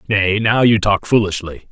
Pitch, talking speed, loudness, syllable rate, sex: 105 Hz, 175 wpm, -15 LUFS, 4.6 syllables/s, male